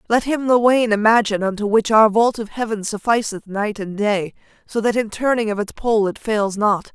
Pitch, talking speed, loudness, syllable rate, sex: 215 Hz, 215 wpm, -18 LUFS, 5.1 syllables/s, female